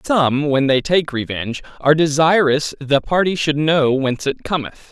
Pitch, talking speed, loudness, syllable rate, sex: 145 Hz, 170 wpm, -17 LUFS, 4.8 syllables/s, male